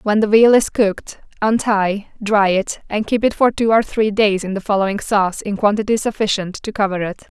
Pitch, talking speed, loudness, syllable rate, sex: 210 Hz, 210 wpm, -17 LUFS, 5.3 syllables/s, female